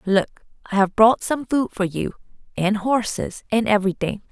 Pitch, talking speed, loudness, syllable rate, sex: 210 Hz, 165 wpm, -21 LUFS, 5.0 syllables/s, female